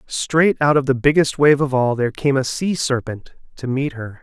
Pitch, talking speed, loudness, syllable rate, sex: 135 Hz, 225 wpm, -18 LUFS, 4.9 syllables/s, male